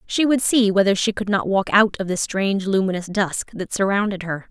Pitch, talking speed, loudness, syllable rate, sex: 200 Hz, 225 wpm, -20 LUFS, 5.4 syllables/s, female